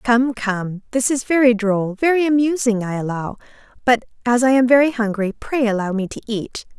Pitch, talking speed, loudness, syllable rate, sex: 235 Hz, 170 wpm, -18 LUFS, 5.1 syllables/s, female